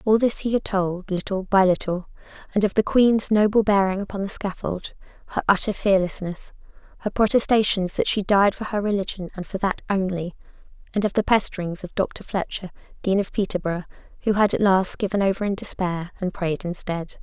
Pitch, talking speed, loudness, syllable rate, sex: 195 Hz, 185 wpm, -23 LUFS, 5.5 syllables/s, female